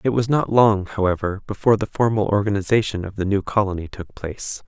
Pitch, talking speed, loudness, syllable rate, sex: 100 Hz, 195 wpm, -21 LUFS, 6.0 syllables/s, male